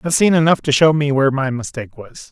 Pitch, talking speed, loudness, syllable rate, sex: 140 Hz, 260 wpm, -15 LUFS, 6.8 syllables/s, male